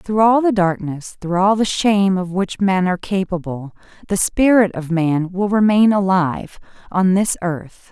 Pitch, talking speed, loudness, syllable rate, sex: 190 Hz, 175 wpm, -17 LUFS, 4.5 syllables/s, female